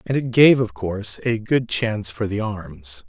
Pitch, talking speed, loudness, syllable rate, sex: 110 Hz, 215 wpm, -20 LUFS, 4.5 syllables/s, male